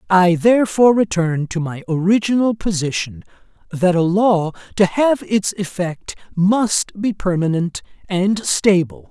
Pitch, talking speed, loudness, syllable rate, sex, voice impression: 185 Hz, 125 wpm, -17 LUFS, 4.2 syllables/s, male, masculine, adult-like, relaxed, bright, muffled, fluent, slightly refreshing, sincere, calm, friendly, slightly reassuring, slightly wild, kind